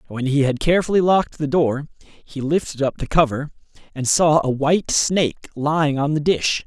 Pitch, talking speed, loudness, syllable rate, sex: 145 Hz, 190 wpm, -19 LUFS, 5.3 syllables/s, male